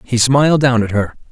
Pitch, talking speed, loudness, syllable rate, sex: 120 Hz, 230 wpm, -14 LUFS, 5.5 syllables/s, male